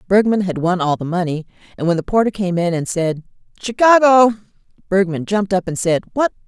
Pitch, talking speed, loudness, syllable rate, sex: 190 Hz, 195 wpm, -17 LUFS, 5.8 syllables/s, female